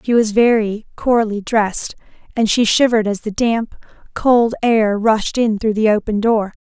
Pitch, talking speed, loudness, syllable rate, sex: 220 Hz, 170 wpm, -16 LUFS, 4.6 syllables/s, female